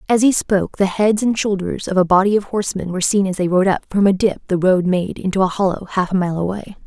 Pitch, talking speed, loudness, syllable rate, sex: 190 Hz, 270 wpm, -17 LUFS, 6.1 syllables/s, female